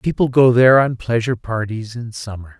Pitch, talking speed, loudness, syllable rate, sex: 115 Hz, 185 wpm, -16 LUFS, 5.5 syllables/s, male